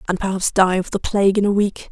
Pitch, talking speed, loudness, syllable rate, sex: 195 Hz, 285 wpm, -18 LUFS, 6.4 syllables/s, female